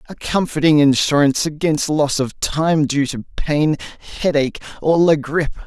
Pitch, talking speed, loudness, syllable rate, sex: 150 Hz, 150 wpm, -17 LUFS, 5.0 syllables/s, male